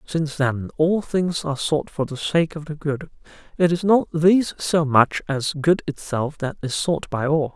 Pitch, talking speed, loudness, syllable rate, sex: 155 Hz, 205 wpm, -21 LUFS, 4.5 syllables/s, male